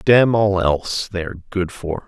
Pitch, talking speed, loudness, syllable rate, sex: 95 Hz, 200 wpm, -19 LUFS, 5.1 syllables/s, male